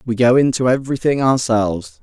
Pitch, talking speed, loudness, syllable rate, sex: 125 Hz, 150 wpm, -16 LUFS, 5.9 syllables/s, male